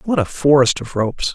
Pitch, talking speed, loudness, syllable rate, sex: 140 Hz, 225 wpm, -17 LUFS, 5.6 syllables/s, male